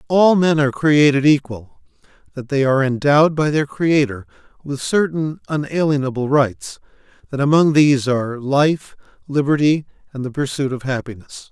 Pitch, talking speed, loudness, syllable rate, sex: 140 Hz, 140 wpm, -17 LUFS, 5.1 syllables/s, male